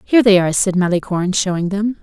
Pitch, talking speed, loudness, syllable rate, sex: 195 Hz, 210 wpm, -16 LUFS, 6.8 syllables/s, female